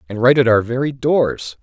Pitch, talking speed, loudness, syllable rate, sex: 120 Hz, 220 wpm, -16 LUFS, 4.9 syllables/s, male